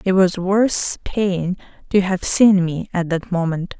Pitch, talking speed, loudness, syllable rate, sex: 185 Hz, 175 wpm, -18 LUFS, 3.6 syllables/s, female